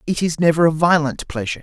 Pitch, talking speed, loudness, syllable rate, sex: 160 Hz, 220 wpm, -17 LUFS, 6.7 syllables/s, male